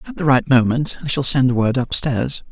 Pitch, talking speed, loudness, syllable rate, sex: 135 Hz, 215 wpm, -17 LUFS, 4.9 syllables/s, male